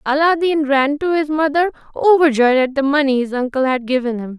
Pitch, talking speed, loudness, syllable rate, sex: 280 Hz, 190 wpm, -16 LUFS, 5.5 syllables/s, female